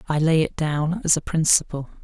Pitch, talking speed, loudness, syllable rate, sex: 155 Hz, 205 wpm, -21 LUFS, 5.3 syllables/s, male